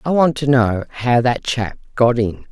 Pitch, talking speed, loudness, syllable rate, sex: 125 Hz, 215 wpm, -17 LUFS, 4.5 syllables/s, female